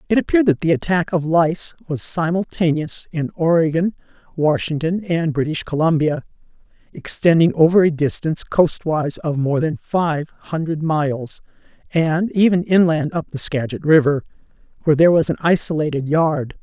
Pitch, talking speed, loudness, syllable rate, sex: 160 Hz, 140 wpm, -18 LUFS, 5.0 syllables/s, female